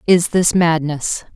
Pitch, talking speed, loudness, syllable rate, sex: 165 Hz, 135 wpm, -16 LUFS, 3.5 syllables/s, female